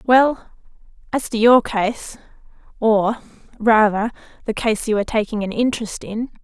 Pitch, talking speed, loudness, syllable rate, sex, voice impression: 225 Hz, 140 wpm, -19 LUFS, 4.7 syllables/s, female, feminine, very adult-like, slightly soft, slightly cute, slightly sincere, calm, slightly sweet, slightly kind